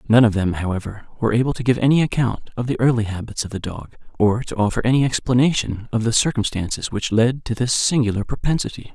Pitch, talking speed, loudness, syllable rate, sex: 115 Hz, 210 wpm, -20 LUFS, 6.3 syllables/s, male